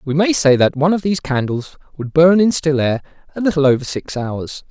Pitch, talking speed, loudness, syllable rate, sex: 150 Hz, 230 wpm, -16 LUFS, 5.7 syllables/s, male